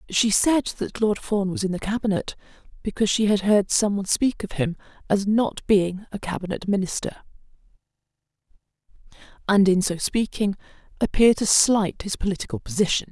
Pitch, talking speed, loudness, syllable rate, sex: 200 Hz, 155 wpm, -22 LUFS, 5.4 syllables/s, female